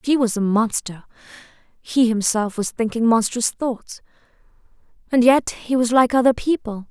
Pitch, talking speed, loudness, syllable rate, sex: 235 Hz, 140 wpm, -19 LUFS, 4.6 syllables/s, female